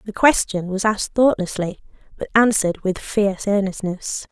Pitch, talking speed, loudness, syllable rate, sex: 200 Hz, 140 wpm, -20 LUFS, 5.2 syllables/s, female